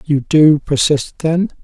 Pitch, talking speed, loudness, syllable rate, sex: 150 Hz, 145 wpm, -14 LUFS, 3.5 syllables/s, male